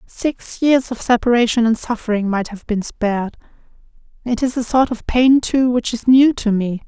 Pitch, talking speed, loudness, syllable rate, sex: 235 Hz, 190 wpm, -17 LUFS, 4.8 syllables/s, female